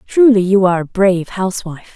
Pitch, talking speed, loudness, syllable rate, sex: 195 Hz, 185 wpm, -14 LUFS, 6.6 syllables/s, female